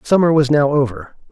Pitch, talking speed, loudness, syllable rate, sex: 145 Hz, 185 wpm, -15 LUFS, 5.8 syllables/s, male